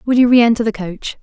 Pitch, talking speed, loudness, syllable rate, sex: 225 Hz, 245 wpm, -14 LUFS, 6.4 syllables/s, female